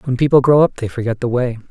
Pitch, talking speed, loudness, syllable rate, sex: 125 Hz, 280 wpm, -15 LUFS, 6.7 syllables/s, male